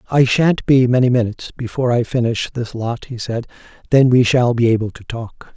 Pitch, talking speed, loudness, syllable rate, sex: 120 Hz, 205 wpm, -17 LUFS, 5.4 syllables/s, male